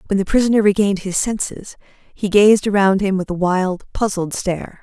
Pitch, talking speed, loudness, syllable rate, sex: 195 Hz, 185 wpm, -17 LUFS, 5.3 syllables/s, female